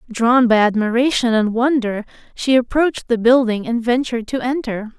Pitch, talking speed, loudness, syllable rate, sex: 240 Hz, 155 wpm, -17 LUFS, 5.4 syllables/s, female